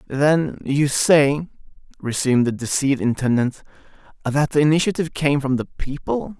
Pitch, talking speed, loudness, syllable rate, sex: 140 Hz, 130 wpm, -20 LUFS, 4.9 syllables/s, male